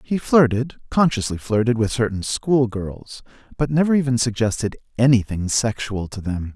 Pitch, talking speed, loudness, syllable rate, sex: 120 Hz, 145 wpm, -20 LUFS, 4.9 syllables/s, male